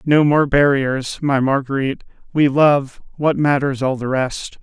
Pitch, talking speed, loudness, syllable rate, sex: 140 Hz, 155 wpm, -17 LUFS, 4.2 syllables/s, male